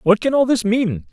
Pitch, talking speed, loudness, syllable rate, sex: 215 Hz, 270 wpm, -17 LUFS, 4.9 syllables/s, male